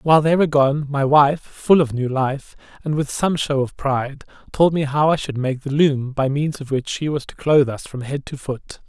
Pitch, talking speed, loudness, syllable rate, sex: 140 Hz, 250 wpm, -19 LUFS, 5.0 syllables/s, male